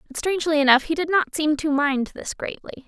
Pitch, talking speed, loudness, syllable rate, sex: 305 Hz, 230 wpm, -21 LUFS, 5.9 syllables/s, female